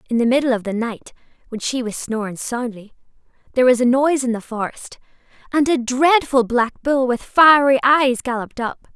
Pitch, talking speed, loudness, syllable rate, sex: 250 Hz, 190 wpm, -18 LUFS, 5.3 syllables/s, female